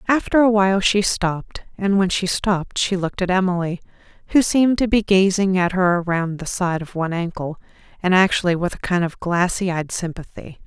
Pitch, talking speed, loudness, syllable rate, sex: 185 Hz, 195 wpm, -19 LUFS, 5.5 syllables/s, female